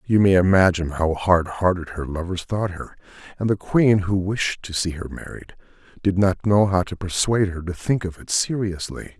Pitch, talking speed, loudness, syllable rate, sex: 95 Hz, 200 wpm, -21 LUFS, 5.0 syllables/s, male